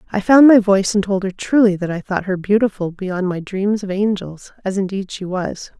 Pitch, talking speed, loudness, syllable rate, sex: 195 Hz, 215 wpm, -17 LUFS, 5.2 syllables/s, female